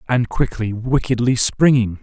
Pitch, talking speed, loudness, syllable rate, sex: 120 Hz, 120 wpm, -18 LUFS, 4.4 syllables/s, male